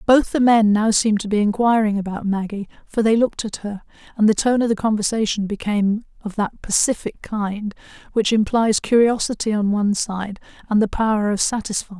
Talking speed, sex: 205 wpm, female